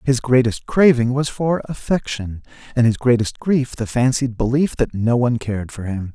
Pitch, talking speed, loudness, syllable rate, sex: 125 Hz, 185 wpm, -19 LUFS, 4.9 syllables/s, male